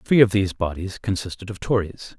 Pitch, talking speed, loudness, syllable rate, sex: 100 Hz, 190 wpm, -23 LUFS, 5.8 syllables/s, male